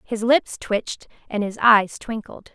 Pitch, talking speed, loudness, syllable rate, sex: 220 Hz, 165 wpm, -21 LUFS, 4.1 syllables/s, female